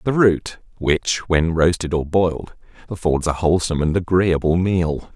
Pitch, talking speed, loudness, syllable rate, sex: 85 Hz, 150 wpm, -19 LUFS, 4.7 syllables/s, male